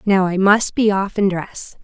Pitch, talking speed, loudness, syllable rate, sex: 195 Hz, 230 wpm, -17 LUFS, 4.1 syllables/s, female